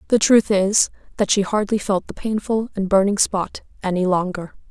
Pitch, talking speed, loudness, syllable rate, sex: 200 Hz, 180 wpm, -20 LUFS, 4.9 syllables/s, female